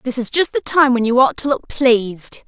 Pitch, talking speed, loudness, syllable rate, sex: 255 Hz, 265 wpm, -16 LUFS, 5.2 syllables/s, female